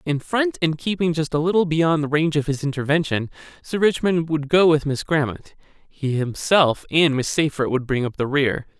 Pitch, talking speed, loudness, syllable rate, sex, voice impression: 155 Hz, 205 wpm, -20 LUFS, 5.0 syllables/s, male, masculine, adult-like, slightly fluent, refreshing, slightly sincere, lively